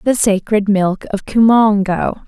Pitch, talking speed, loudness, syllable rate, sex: 205 Hz, 130 wpm, -14 LUFS, 3.8 syllables/s, female